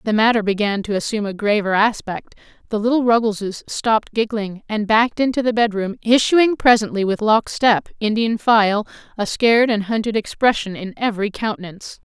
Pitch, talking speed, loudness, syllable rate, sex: 215 Hz, 170 wpm, -18 LUFS, 5.5 syllables/s, female